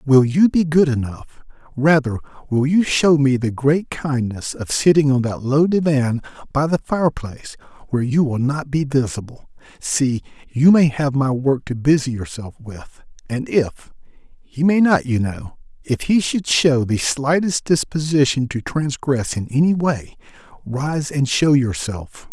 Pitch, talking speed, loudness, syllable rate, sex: 140 Hz, 150 wpm, -18 LUFS, 4.3 syllables/s, male